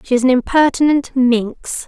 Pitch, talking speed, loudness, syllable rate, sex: 260 Hz, 130 wpm, -15 LUFS, 4.5 syllables/s, female